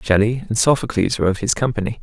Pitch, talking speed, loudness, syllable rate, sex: 110 Hz, 210 wpm, -19 LUFS, 7.0 syllables/s, male